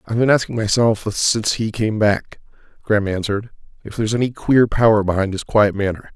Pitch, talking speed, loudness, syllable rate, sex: 110 Hz, 185 wpm, -18 LUFS, 5.9 syllables/s, male